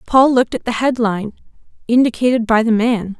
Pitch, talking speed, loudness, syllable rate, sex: 235 Hz, 170 wpm, -16 LUFS, 5.8 syllables/s, female